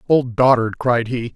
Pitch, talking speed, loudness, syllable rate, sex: 120 Hz, 175 wpm, -17 LUFS, 4.3 syllables/s, male